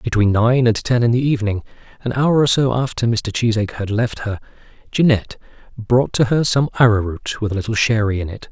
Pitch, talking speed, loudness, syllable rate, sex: 115 Hz, 205 wpm, -18 LUFS, 5.8 syllables/s, male